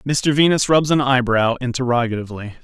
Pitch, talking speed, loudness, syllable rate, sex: 130 Hz, 135 wpm, -17 LUFS, 6.0 syllables/s, male